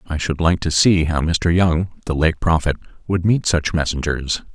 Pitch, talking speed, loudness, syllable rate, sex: 80 Hz, 200 wpm, -18 LUFS, 4.5 syllables/s, male